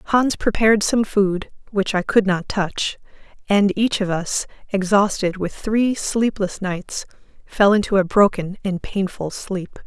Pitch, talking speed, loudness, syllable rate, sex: 200 Hz, 150 wpm, -20 LUFS, 3.9 syllables/s, female